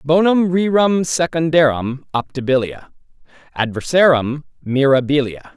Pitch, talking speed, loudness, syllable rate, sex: 145 Hz, 65 wpm, -16 LUFS, 4.5 syllables/s, male